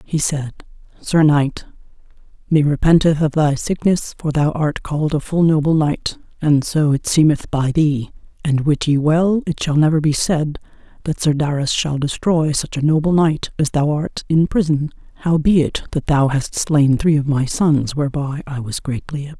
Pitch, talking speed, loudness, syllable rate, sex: 150 Hz, 185 wpm, -17 LUFS, 4.7 syllables/s, female